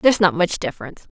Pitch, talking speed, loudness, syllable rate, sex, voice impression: 180 Hz, 260 wpm, -19 LUFS, 8.4 syllables/s, female, very gender-neutral, adult-like, slightly middle-aged, very thin, very tensed, powerful, very bright, hard, very clear, slightly fluent, cute, very refreshing, slightly sincere, slightly calm, slightly friendly, very unique, very elegant, very lively, strict, very sharp, very light